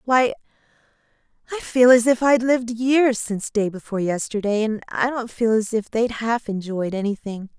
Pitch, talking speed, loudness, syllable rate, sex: 225 Hz, 175 wpm, -21 LUFS, 5.0 syllables/s, female